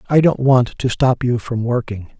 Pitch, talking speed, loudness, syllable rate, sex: 125 Hz, 220 wpm, -17 LUFS, 4.7 syllables/s, male